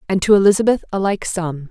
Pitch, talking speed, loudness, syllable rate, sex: 190 Hz, 210 wpm, -16 LUFS, 6.2 syllables/s, female